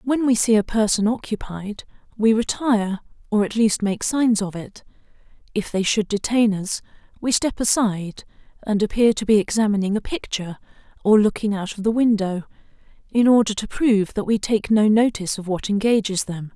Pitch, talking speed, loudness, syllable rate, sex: 210 Hz, 180 wpm, -20 LUFS, 5.3 syllables/s, female